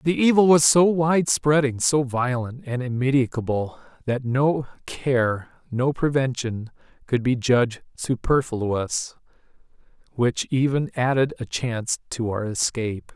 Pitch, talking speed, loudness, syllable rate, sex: 130 Hz, 125 wpm, -22 LUFS, 4.1 syllables/s, male